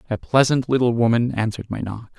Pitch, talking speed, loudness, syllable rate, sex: 115 Hz, 190 wpm, -20 LUFS, 6.2 syllables/s, male